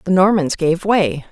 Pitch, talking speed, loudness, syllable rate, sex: 175 Hz, 180 wpm, -16 LUFS, 4.3 syllables/s, female